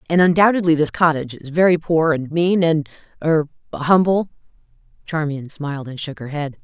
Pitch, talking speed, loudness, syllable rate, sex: 160 Hz, 145 wpm, -18 LUFS, 5.4 syllables/s, female